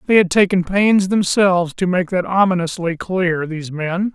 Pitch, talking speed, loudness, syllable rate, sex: 180 Hz, 175 wpm, -17 LUFS, 4.8 syllables/s, male